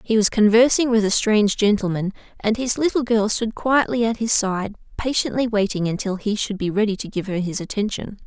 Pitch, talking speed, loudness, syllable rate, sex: 215 Hz, 205 wpm, -20 LUFS, 5.5 syllables/s, female